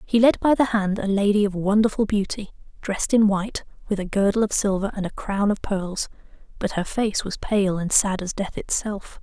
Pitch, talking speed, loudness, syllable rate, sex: 205 Hz, 215 wpm, -22 LUFS, 5.2 syllables/s, female